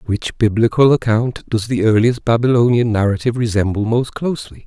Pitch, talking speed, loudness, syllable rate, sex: 115 Hz, 140 wpm, -16 LUFS, 5.5 syllables/s, male